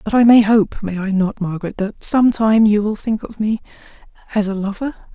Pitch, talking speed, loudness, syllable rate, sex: 210 Hz, 220 wpm, -17 LUFS, 5.3 syllables/s, female